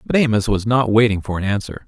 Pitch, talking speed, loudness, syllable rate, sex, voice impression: 110 Hz, 255 wpm, -18 LUFS, 6.3 syllables/s, male, masculine, adult-like, tensed, bright, clear, fluent, intellectual, friendly, lively, slightly intense